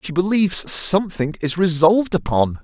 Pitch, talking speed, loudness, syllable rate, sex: 175 Hz, 135 wpm, -18 LUFS, 5.3 syllables/s, male